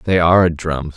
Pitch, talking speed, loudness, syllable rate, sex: 85 Hz, 190 wpm, -15 LUFS, 4.4 syllables/s, male